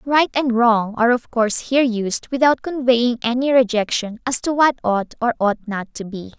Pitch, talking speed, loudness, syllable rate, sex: 240 Hz, 195 wpm, -18 LUFS, 4.9 syllables/s, female